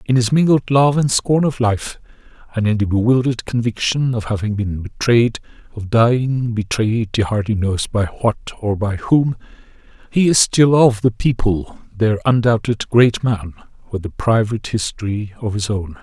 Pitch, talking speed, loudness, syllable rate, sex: 115 Hz, 165 wpm, -17 LUFS, 4.7 syllables/s, male